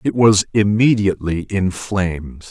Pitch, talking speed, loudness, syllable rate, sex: 95 Hz, 120 wpm, -17 LUFS, 4.3 syllables/s, male